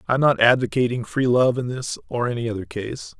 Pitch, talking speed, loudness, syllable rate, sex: 125 Hz, 225 wpm, -21 LUFS, 5.8 syllables/s, male